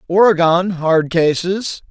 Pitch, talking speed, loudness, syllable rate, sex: 175 Hz, 95 wpm, -15 LUFS, 3.6 syllables/s, male